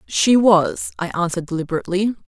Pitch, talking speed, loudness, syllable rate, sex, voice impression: 185 Hz, 130 wpm, -18 LUFS, 6.2 syllables/s, female, feminine, adult-like, powerful, fluent, intellectual, slightly strict